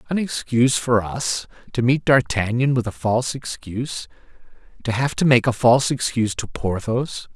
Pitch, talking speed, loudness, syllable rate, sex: 120 Hz, 165 wpm, -21 LUFS, 5.1 syllables/s, male